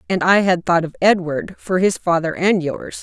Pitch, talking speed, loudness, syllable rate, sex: 180 Hz, 220 wpm, -18 LUFS, 4.7 syllables/s, female